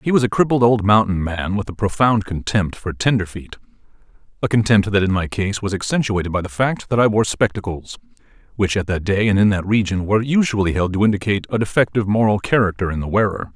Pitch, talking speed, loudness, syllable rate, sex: 100 Hz, 210 wpm, -18 LUFS, 6.2 syllables/s, male